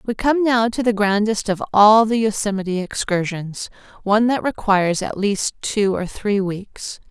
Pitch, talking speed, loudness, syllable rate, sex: 210 Hz, 170 wpm, -19 LUFS, 4.5 syllables/s, female